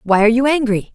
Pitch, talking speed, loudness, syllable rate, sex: 235 Hz, 255 wpm, -15 LUFS, 7.1 syllables/s, female